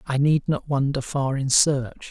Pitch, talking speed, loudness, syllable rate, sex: 140 Hz, 200 wpm, -22 LUFS, 4.1 syllables/s, male